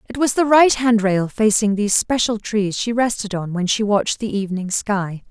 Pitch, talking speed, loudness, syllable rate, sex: 215 Hz, 205 wpm, -18 LUFS, 5.1 syllables/s, female